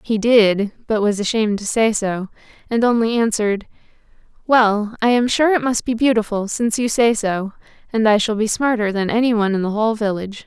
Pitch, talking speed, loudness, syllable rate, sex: 220 Hz, 195 wpm, -18 LUFS, 5.5 syllables/s, female